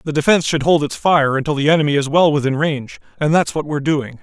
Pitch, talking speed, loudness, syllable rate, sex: 150 Hz, 255 wpm, -16 LUFS, 6.7 syllables/s, male